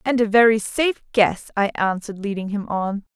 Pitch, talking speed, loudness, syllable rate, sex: 215 Hz, 190 wpm, -20 LUFS, 5.4 syllables/s, female